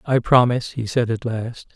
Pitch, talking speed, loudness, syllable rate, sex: 120 Hz, 205 wpm, -20 LUFS, 5.0 syllables/s, male